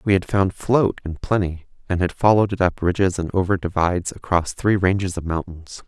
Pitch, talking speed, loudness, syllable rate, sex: 90 Hz, 205 wpm, -21 LUFS, 5.5 syllables/s, male